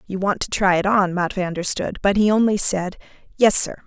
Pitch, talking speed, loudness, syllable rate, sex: 195 Hz, 215 wpm, -19 LUFS, 5.4 syllables/s, female